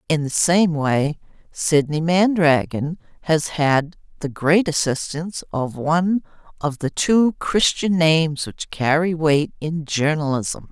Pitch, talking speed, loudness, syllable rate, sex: 160 Hz, 130 wpm, -20 LUFS, 3.8 syllables/s, female